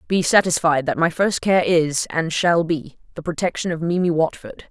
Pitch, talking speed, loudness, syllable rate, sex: 165 Hz, 190 wpm, -19 LUFS, 4.9 syllables/s, female